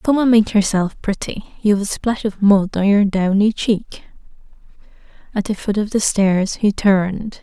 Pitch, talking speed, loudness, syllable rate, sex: 205 Hz, 180 wpm, -17 LUFS, 4.4 syllables/s, female